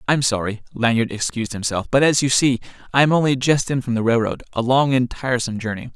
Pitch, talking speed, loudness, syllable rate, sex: 125 Hz, 220 wpm, -19 LUFS, 6.3 syllables/s, male